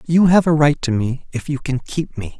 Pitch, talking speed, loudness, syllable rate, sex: 145 Hz, 275 wpm, -18 LUFS, 5.1 syllables/s, male